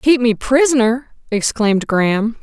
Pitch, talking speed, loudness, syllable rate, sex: 240 Hz, 125 wpm, -16 LUFS, 4.7 syllables/s, female